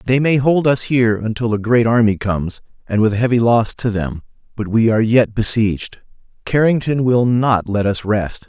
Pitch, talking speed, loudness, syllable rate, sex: 115 Hz, 190 wpm, -16 LUFS, 5.0 syllables/s, male